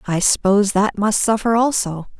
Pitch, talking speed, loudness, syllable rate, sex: 205 Hz, 165 wpm, -17 LUFS, 5.1 syllables/s, female